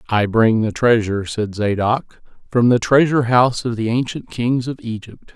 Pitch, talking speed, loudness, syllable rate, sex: 115 Hz, 180 wpm, -18 LUFS, 4.9 syllables/s, male